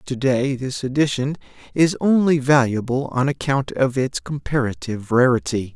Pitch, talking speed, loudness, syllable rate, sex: 135 Hz, 135 wpm, -20 LUFS, 4.8 syllables/s, male